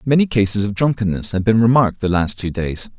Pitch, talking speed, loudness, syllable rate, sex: 105 Hz, 220 wpm, -17 LUFS, 6.0 syllables/s, male